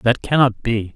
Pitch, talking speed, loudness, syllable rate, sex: 120 Hz, 190 wpm, -18 LUFS, 4.4 syllables/s, male